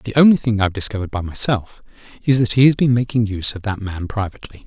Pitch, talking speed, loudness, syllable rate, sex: 110 Hz, 230 wpm, -18 LUFS, 6.8 syllables/s, male